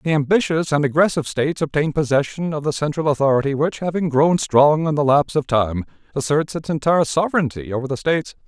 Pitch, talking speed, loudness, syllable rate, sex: 150 Hz, 190 wpm, -19 LUFS, 6.3 syllables/s, male